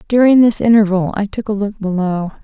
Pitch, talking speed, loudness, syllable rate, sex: 205 Hz, 195 wpm, -14 LUFS, 5.6 syllables/s, female